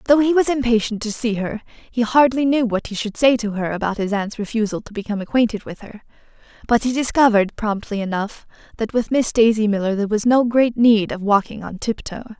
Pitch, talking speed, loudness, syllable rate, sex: 225 Hz, 215 wpm, -19 LUFS, 5.8 syllables/s, female